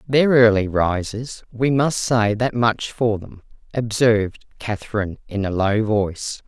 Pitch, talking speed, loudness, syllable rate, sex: 110 Hz, 150 wpm, -20 LUFS, 4.4 syllables/s, female